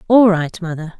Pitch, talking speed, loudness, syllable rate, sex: 185 Hz, 180 wpm, -16 LUFS, 5.0 syllables/s, female